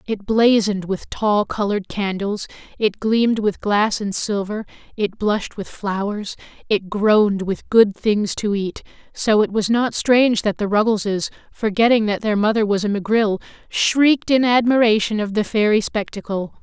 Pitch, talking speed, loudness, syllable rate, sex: 210 Hz, 160 wpm, -19 LUFS, 4.7 syllables/s, female